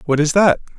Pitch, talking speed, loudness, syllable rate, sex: 160 Hz, 230 wpm, -15 LUFS, 6.3 syllables/s, male